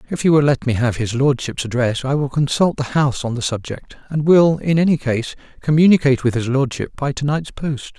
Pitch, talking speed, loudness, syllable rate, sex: 140 Hz, 225 wpm, -18 LUFS, 5.5 syllables/s, male